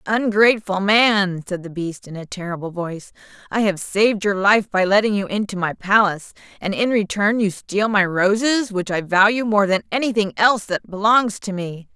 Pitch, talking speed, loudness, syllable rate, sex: 200 Hz, 195 wpm, -19 LUFS, 5.1 syllables/s, female